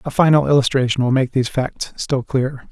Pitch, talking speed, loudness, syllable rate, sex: 130 Hz, 200 wpm, -18 LUFS, 5.9 syllables/s, male